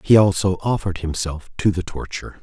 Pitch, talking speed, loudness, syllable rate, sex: 90 Hz, 175 wpm, -21 LUFS, 5.9 syllables/s, male